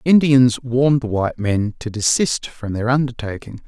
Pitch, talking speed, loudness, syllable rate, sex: 120 Hz, 165 wpm, -18 LUFS, 4.8 syllables/s, male